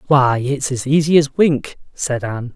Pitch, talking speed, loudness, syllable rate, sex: 135 Hz, 190 wpm, -17 LUFS, 4.5 syllables/s, male